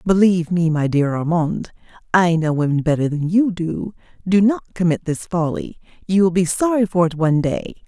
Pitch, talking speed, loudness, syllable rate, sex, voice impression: 175 Hz, 190 wpm, -18 LUFS, 5.2 syllables/s, female, feminine, slightly gender-neutral, slightly young, adult-like, slightly thin, tensed, bright, soft, very clear, very fluent, cool, very intellectual, refreshing, sincere, very calm, friendly, reassuring, slightly elegant, sweet, very kind